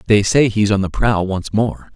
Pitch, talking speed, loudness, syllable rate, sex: 105 Hz, 245 wpm, -16 LUFS, 4.6 syllables/s, male